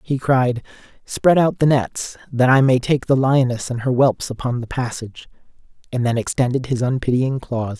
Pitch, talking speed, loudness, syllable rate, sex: 125 Hz, 185 wpm, -19 LUFS, 4.9 syllables/s, male